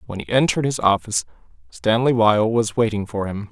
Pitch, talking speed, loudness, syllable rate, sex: 110 Hz, 190 wpm, -20 LUFS, 5.8 syllables/s, male